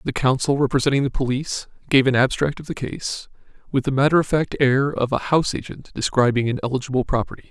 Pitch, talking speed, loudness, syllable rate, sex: 135 Hz, 200 wpm, -21 LUFS, 6.3 syllables/s, male